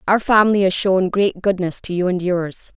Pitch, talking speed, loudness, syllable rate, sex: 190 Hz, 215 wpm, -18 LUFS, 5.0 syllables/s, female